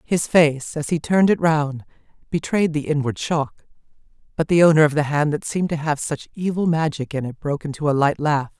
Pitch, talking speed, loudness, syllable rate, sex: 150 Hz, 215 wpm, -20 LUFS, 5.5 syllables/s, female